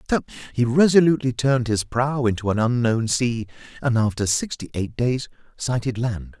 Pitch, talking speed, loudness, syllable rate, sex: 125 Hz, 160 wpm, -22 LUFS, 5.2 syllables/s, male